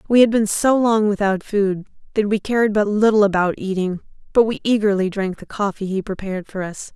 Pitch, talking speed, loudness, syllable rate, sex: 205 Hz, 205 wpm, -19 LUFS, 5.5 syllables/s, female